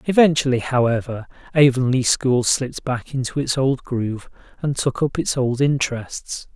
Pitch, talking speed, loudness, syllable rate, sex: 130 Hz, 145 wpm, -20 LUFS, 4.8 syllables/s, male